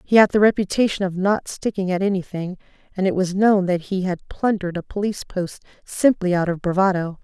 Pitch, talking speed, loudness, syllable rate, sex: 190 Hz, 200 wpm, -21 LUFS, 5.8 syllables/s, female